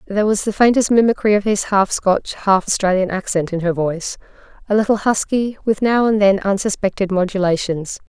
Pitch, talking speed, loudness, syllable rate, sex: 200 Hz, 170 wpm, -17 LUFS, 5.5 syllables/s, female